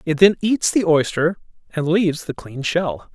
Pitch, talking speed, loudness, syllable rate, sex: 165 Hz, 190 wpm, -19 LUFS, 4.5 syllables/s, male